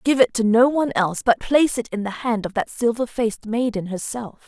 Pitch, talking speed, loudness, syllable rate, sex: 230 Hz, 240 wpm, -21 LUFS, 5.8 syllables/s, female